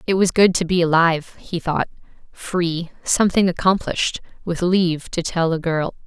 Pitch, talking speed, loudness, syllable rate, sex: 175 Hz, 170 wpm, -19 LUFS, 5.1 syllables/s, female